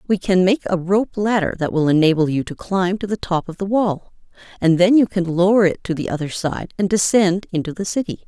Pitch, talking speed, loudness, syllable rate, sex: 185 Hz, 240 wpm, -18 LUFS, 5.5 syllables/s, female